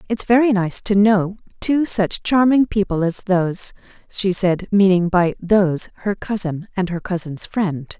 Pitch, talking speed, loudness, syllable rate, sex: 195 Hz, 165 wpm, -18 LUFS, 4.3 syllables/s, female